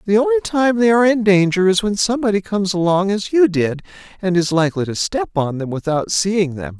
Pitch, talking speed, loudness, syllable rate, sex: 195 Hz, 220 wpm, -17 LUFS, 5.8 syllables/s, male